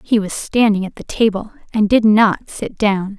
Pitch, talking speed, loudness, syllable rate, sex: 210 Hz, 205 wpm, -16 LUFS, 4.5 syllables/s, female